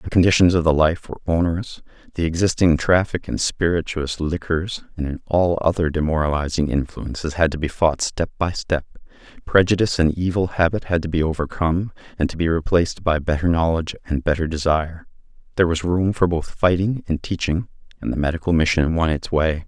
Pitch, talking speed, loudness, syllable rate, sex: 85 Hz, 180 wpm, -20 LUFS, 5.8 syllables/s, male